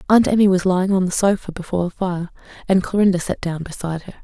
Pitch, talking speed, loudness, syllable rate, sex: 185 Hz, 225 wpm, -19 LUFS, 6.9 syllables/s, female